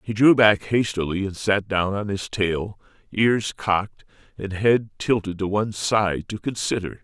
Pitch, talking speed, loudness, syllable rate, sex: 100 Hz, 170 wpm, -22 LUFS, 4.4 syllables/s, male